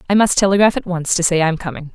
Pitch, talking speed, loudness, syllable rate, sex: 180 Hz, 280 wpm, -16 LUFS, 6.8 syllables/s, female